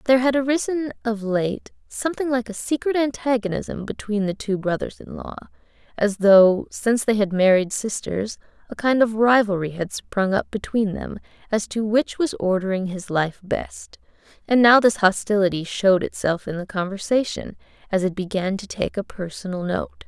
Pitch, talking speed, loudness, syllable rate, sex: 210 Hz, 170 wpm, -21 LUFS, 5.0 syllables/s, female